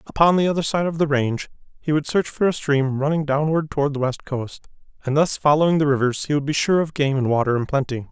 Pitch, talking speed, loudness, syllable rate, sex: 145 Hz, 250 wpm, -20 LUFS, 6.2 syllables/s, male